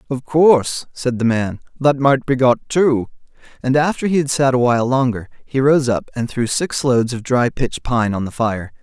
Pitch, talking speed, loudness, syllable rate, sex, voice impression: 130 Hz, 220 wpm, -17 LUFS, 4.7 syllables/s, male, masculine, adult-like, thick, tensed, powerful, clear, slightly nasal, intellectual, friendly, slightly wild, lively